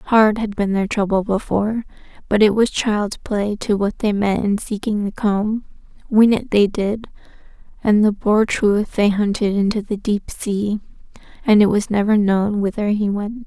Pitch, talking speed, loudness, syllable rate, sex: 210 Hz, 185 wpm, -18 LUFS, 4.4 syllables/s, female